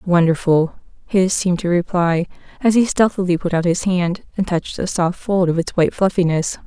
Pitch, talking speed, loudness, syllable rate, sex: 180 Hz, 190 wpm, -18 LUFS, 5.3 syllables/s, female